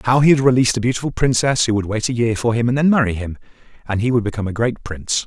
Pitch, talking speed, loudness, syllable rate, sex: 115 Hz, 285 wpm, -18 LUFS, 7.3 syllables/s, male